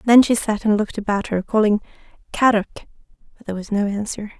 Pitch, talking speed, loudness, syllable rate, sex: 210 Hz, 190 wpm, -20 LUFS, 6.7 syllables/s, female